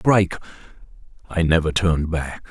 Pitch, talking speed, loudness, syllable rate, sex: 85 Hz, 120 wpm, -21 LUFS, 5.8 syllables/s, male